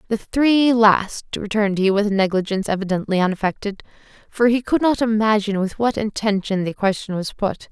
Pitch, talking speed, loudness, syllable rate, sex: 210 Hz, 170 wpm, -19 LUFS, 5.6 syllables/s, female